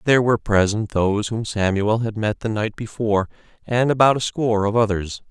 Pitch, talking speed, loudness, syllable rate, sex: 110 Hz, 190 wpm, -20 LUFS, 5.7 syllables/s, male